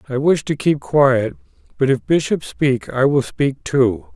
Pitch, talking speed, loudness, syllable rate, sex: 140 Hz, 190 wpm, -18 LUFS, 4.0 syllables/s, male